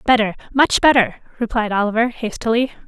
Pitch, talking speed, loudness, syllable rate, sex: 235 Hz, 105 wpm, -18 LUFS, 5.9 syllables/s, female